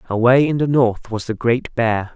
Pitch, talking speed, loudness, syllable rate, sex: 120 Hz, 220 wpm, -18 LUFS, 4.6 syllables/s, male